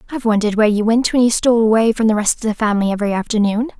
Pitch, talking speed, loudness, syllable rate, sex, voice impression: 220 Hz, 270 wpm, -16 LUFS, 8.4 syllables/s, female, feminine, adult-like, slightly fluent, slightly cute, sincere, friendly